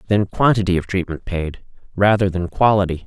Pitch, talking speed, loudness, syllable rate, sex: 95 Hz, 155 wpm, -18 LUFS, 5.5 syllables/s, male